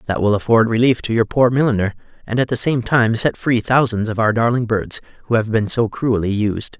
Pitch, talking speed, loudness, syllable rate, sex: 115 Hz, 230 wpm, -17 LUFS, 5.5 syllables/s, male